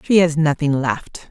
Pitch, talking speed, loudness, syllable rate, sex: 155 Hz, 185 wpm, -18 LUFS, 4.1 syllables/s, female